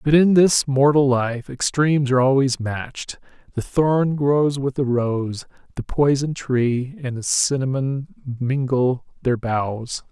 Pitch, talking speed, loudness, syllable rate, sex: 135 Hz, 140 wpm, -20 LUFS, 3.8 syllables/s, male